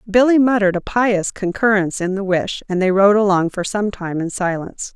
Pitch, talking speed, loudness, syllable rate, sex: 200 Hz, 205 wpm, -17 LUFS, 5.5 syllables/s, female